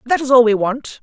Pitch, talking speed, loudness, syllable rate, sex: 245 Hz, 290 wpm, -14 LUFS, 5.4 syllables/s, female